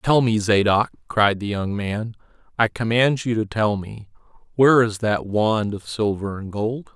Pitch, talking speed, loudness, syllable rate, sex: 110 Hz, 180 wpm, -21 LUFS, 4.3 syllables/s, male